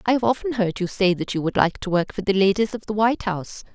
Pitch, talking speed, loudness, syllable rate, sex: 200 Hz, 305 wpm, -22 LUFS, 6.6 syllables/s, female